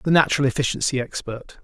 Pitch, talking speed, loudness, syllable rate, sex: 135 Hz, 145 wpm, -21 LUFS, 6.7 syllables/s, male